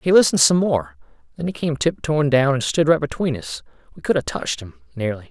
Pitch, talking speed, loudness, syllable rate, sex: 140 Hz, 225 wpm, -20 LUFS, 5.8 syllables/s, male